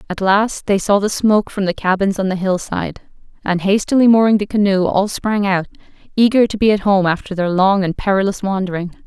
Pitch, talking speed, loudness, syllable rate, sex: 195 Hz, 205 wpm, -16 LUFS, 5.7 syllables/s, female